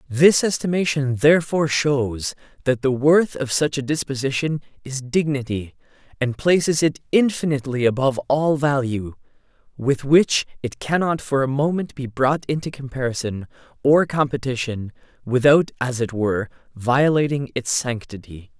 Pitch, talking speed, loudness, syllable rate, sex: 135 Hz, 130 wpm, -20 LUFS, 4.8 syllables/s, male